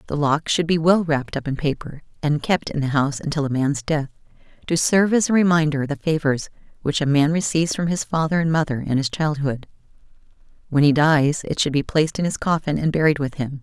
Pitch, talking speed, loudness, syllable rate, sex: 150 Hz, 230 wpm, -20 LUFS, 6.0 syllables/s, female